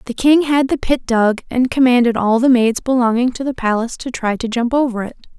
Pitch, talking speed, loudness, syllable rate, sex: 245 Hz, 235 wpm, -16 LUFS, 5.6 syllables/s, female